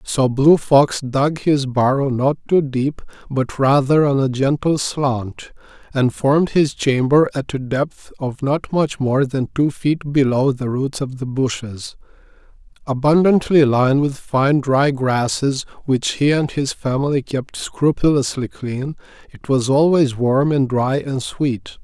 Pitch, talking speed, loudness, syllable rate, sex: 135 Hz, 155 wpm, -18 LUFS, 3.9 syllables/s, male